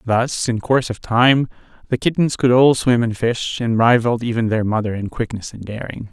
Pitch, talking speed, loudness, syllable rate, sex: 115 Hz, 205 wpm, -18 LUFS, 5.2 syllables/s, male